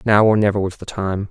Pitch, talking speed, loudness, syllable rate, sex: 100 Hz, 275 wpm, -18 LUFS, 5.8 syllables/s, male